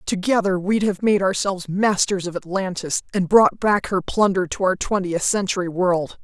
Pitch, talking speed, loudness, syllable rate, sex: 190 Hz, 175 wpm, -20 LUFS, 4.8 syllables/s, female